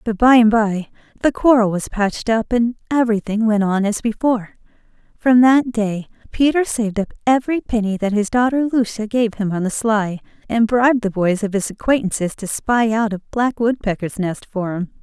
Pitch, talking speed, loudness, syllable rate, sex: 220 Hz, 190 wpm, -18 LUFS, 5.3 syllables/s, female